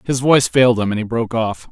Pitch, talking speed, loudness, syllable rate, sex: 120 Hz, 280 wpm, -16 LUFS, 6.8 syllables/s, male